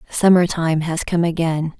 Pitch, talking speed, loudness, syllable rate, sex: 165 Hz, 165 wpm, -18 LUFS, 4.5 syllables/s, female